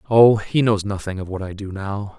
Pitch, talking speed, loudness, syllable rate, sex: 100 Hz, 245 wpm, -20 LUFS, 5.0 syllables/s, male